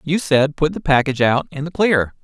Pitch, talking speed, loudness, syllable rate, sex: 150 Hz, 240 wpm, -17 LUFS, 5.4 syllables/s, male